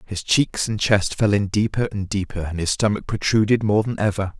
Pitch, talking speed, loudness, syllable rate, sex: 105 Hz, 220 wpm, -21 LUFS, 5.1 syllables/s, male